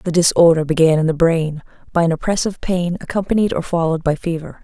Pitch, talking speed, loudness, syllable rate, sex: 170 Hz, 195 wpm, -17 LUFS, 6.3 syllables/s, female